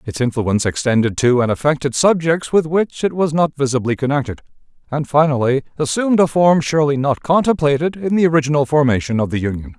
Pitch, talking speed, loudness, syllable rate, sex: 145 Hz, 180 wpm, -16 LUFS, 6.1 syllables/s, male